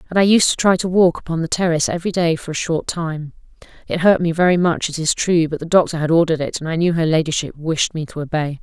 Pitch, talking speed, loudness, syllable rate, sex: 165 Hz, 270 wpm, -18 LUFS, 6.5 syllables/s, female